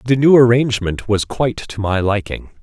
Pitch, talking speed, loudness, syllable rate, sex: 115 Hz, 185 wpm, -16 LUFS, 5.2 syllables/s, male